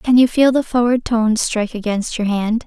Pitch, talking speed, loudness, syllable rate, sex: 230 Hz, 225 wpm, -17 LUFS, 5.3 syllables/s, female